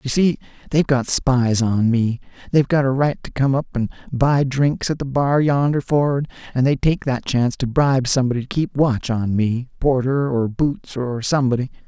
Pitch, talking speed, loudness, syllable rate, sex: 130 Hz, 195 wpm, -19 LUFS, 5.1 syllables/s, male